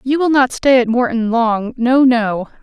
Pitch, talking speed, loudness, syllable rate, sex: 245 Hz, 205 wpm, -14 LUFS, 4.2 syllables/s, female